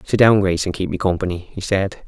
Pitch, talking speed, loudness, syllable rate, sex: 95 Hz, 260 wpm, -19 LUFS, 6.3 syllables/s, male